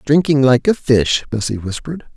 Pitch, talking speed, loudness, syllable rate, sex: 135 Hz, 165 wpm, -16 LUFS, 5.2 syllables/s, male